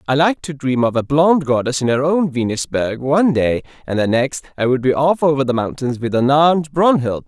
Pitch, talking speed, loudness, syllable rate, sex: 140 Hz, 230 wpm, -17 LUFS, 5.7 syllables/s, male